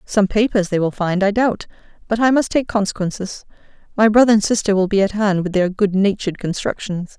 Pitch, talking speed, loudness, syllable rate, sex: 200 Hz, 200 wpm, -17 LUFS, 5.7 syllables/s, female